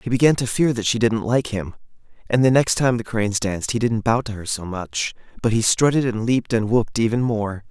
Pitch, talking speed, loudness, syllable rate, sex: 115 Hz, 250 wpm, -20 LUFS, 5.7 syllables/s, male